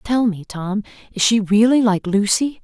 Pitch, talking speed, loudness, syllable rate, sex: 215 Hz, 180 wpm, -18 LUFS, 4.4 syllables/s, female